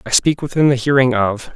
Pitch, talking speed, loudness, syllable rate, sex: 130 Hz, 230 wpm, -16 LUFS, 5.6 syllables/s, male